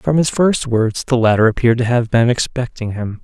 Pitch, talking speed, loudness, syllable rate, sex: 120 Hz, 225 wpm, -16 LUFS, 5.4 syllables/s, male